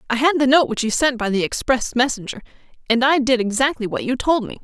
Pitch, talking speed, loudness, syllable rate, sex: 250 Hz, 245 wpm, -19 LUFS, 6.1 syllables/s, female